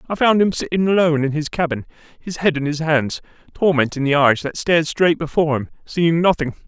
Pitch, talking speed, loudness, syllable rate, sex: 155 Hz, 215 wpm, -18 LUFS, 5.9 syllables/s, male